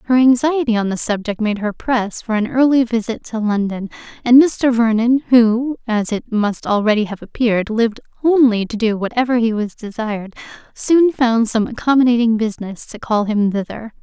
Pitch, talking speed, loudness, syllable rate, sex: 230 Hz, 175 wpm, -17 LUFS, 5.1 syllables/s, female